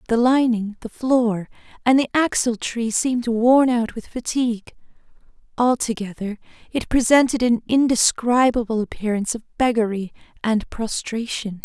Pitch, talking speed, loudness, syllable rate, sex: 235 Hz, 115 wpm, -20 LUFS, 4.7 syllables/s, female